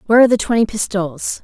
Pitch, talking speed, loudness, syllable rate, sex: 210 Hz, 210 wpm, -16 LUFS, 7.9 syllables/s, female